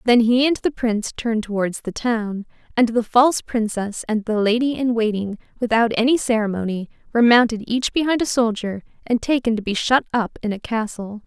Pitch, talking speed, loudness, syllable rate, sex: 230 Hz, 190 wpm, -20 LUFS, 5.4 syllables/s, female